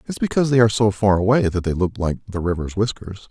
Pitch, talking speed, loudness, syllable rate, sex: 105 Hz, 255 wpm, -19 LUFS, 6.5 syllables/s, male